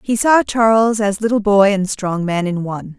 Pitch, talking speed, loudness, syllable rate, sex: 205 Hz, 220 wpm, -15 LUFS, 4.8 syllables/s, female